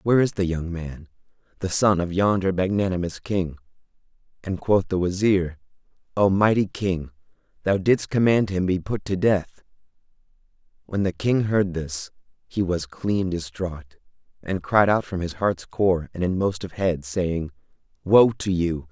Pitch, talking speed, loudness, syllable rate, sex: 95 Hz, 160 wpm, -23 LUFS, 4.4 syllables/s, male